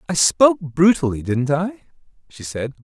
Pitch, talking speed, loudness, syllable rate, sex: 150 Hz, 145 wpm, -18 LUFS, 4.6 syllables/s, male